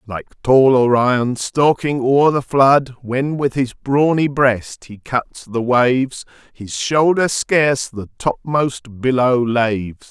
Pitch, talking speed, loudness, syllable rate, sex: 130 Hz, 135 wpm, -16 LUFS, 3.5 syllables/s, male